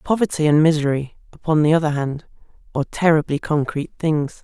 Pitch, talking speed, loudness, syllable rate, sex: 155 Hz, 150 wpm, -19 LUFS, 6.0 syllables/s, female